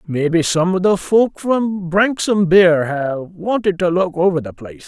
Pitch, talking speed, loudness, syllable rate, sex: 180 Hz, 185 wpm, -16 LUFS, 4.7 syllables/s, male